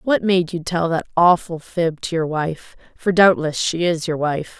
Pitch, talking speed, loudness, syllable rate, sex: 170 Hz, 195 wpm, -19 LUFS, 4.4 syllables/s, female